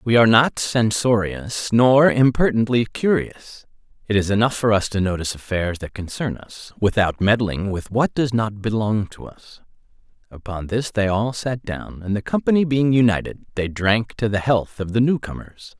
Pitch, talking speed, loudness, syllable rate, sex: 110 Hz, 180 wpm, -20 LUFS, 4.8 syllables/s, male